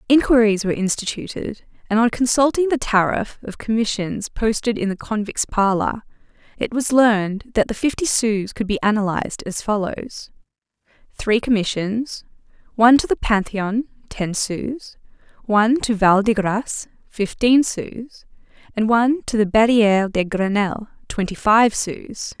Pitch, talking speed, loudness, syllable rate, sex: 220 Hz, 140 wpm, -19 LUFS, 4.6 syllables/s, female